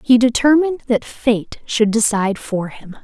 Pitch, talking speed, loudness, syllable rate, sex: 235 Hz, 160 wpm, -17 LUFS, 4.6 syllables/s, female